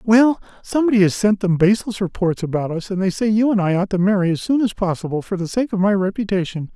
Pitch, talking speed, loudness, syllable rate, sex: 195 Hz, 240 wpm, -19 LUFS, 6.4 syllables/s, male